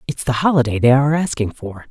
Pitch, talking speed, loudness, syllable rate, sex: 130 Hz, 220 wpm, -17 LUFS, 6.3 syllables/s, female